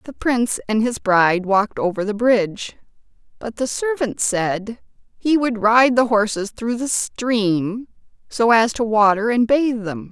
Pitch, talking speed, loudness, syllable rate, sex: 225 Hz, 165 wpm, -18 LUFS, 4.2 syllables/s, female